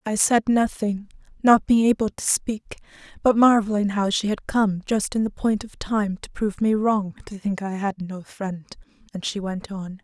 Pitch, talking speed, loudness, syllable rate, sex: 205 Hz, 205 wpm, -22 LUFS, 4.6 syllables/s, female